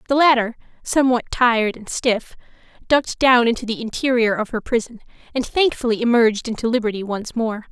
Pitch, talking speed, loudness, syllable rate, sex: 235 Hz, 165 wpm, -19 LUFS, 5.9 syllables/s, female